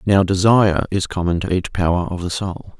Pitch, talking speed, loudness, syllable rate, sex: 95 Hz, 215 wpm, -18 LUFS, 5.4 syllables/s, male